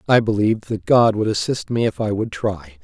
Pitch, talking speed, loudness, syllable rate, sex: 105 Hz, 235 wpm, -19 LUFS, 5.3 syllables/s, male